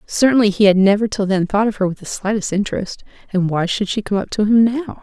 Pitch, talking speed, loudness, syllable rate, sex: 205 Hz, 265 wpm, -17 LUFS, 6.0 syllables/s, female